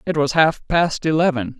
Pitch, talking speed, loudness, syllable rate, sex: 155 Hz, 190 wpm, -18 LUFS, 4.8 syllables/s, male